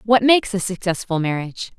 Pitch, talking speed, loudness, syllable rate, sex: 200 Hz, 170 wpm, -19 LUFS, 6.1 syllables/s, female